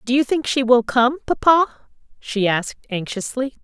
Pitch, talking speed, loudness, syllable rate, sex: 250 Hz, 165 wpm, -19 LUFS, 4.8 syllables/s, female